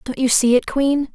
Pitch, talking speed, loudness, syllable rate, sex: 260 Hz, 260 wpm, -17 LUFS, 4.8 syllables/s, female